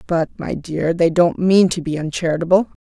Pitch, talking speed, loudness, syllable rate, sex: 170 Hz, 190 wpm, -18 LUFS, 4.9 syllables/s, female